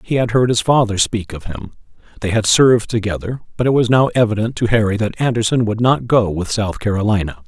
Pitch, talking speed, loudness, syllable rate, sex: 110 Hz, 215 wpm, -16 LUFS, 6.0 syllables/s, male